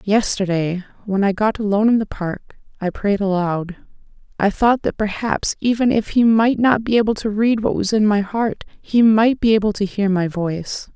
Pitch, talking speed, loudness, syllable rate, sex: 210 Hz, 205 wpm, -18 LUFS, 5.0 syllables/s, female